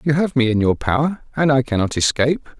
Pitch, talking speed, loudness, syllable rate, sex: 135 Hz, 230 wpm, -18 LUFS, 5.9 syllables/s, male